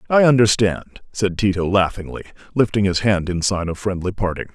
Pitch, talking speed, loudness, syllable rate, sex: 100 Hz, 170 wpm, -19 LUFS, 5.4 syllables/s, male